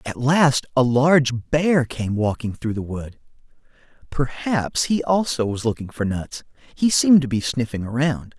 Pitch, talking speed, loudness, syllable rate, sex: 130 Hz, 165 wpm, -20 LUFS, 4.5 syllables/s, male